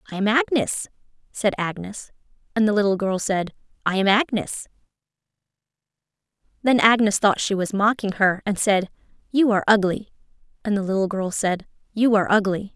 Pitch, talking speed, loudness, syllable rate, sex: 205 Hz, 155 wpm, -21 LUFS, 5.4 syllables/s, female